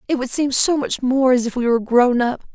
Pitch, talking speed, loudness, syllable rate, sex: 255 Hz, 285 wpm, -18 LUFS, 5.6 syllables/s, female